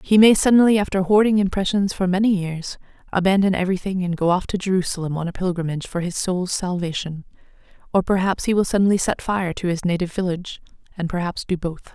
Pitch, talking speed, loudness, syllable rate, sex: 185 Hz, 190 wpm, -20 LUFS, 6.4 syllables/s, female